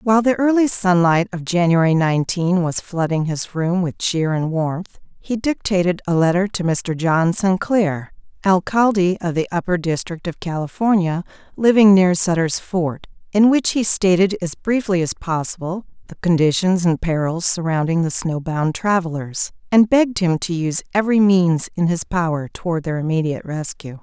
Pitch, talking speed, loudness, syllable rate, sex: 175 Hz, 160 wpm, -18 LUFS, 4.9 syllables/s, female